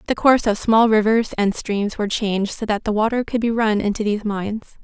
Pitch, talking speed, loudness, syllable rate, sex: 215 Hz, 235 wpm, -19 LUFS, 6.0 syllables/s, female